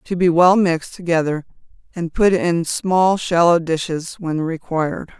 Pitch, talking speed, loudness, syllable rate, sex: 170 Hz, 150 wpm, -18 LUFS, 4.4 syllables/s, female